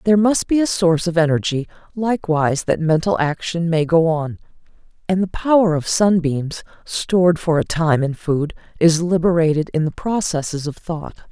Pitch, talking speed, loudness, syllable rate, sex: 170 Hz, 170 wpm, -18 LUFS, 5.1 syllables/s, female